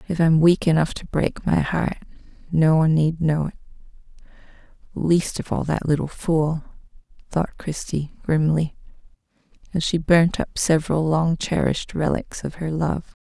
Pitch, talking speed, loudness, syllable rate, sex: 160 Hz, 145 wpm, -22 LUFS, 4.6 syllables/s, female